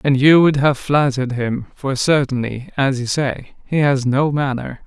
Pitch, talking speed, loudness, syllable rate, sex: 135 Hz, 185 wpm, -17 LUFS, 4.5 syllables/s, male